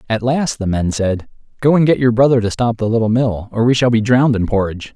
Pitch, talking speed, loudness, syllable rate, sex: 115 Hz, 265 wpm, -15 LUFS, 6.1 syllables/s, male